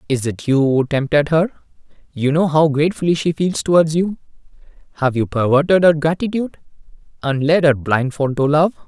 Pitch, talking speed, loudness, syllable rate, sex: 150 Hz, 160 wpm, -17 LUFS, 5.4 syllables/s, male